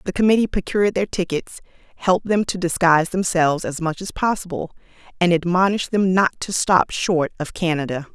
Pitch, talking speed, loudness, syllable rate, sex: 180 Hz, 170 wpm, -20 LUFS, 5.7 syllables/s, female